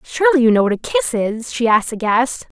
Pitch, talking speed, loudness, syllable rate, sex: 235 Hz, 230 wpm, -16 LUFS, 5.8 syllables/s, female